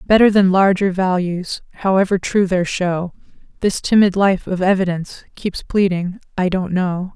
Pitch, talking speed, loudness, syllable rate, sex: 185 Hz, 150 wpm, -17 LUFS, 4.6 syllables/s, female